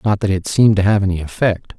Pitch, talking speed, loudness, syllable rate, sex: 100 Hz, 270 wpm, -16 LUFS, 6.5 syllables/s, male